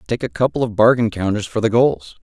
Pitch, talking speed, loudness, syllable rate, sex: 110 Hz, 240 wpm, -17 LUFS, 5.9 syllables/s, male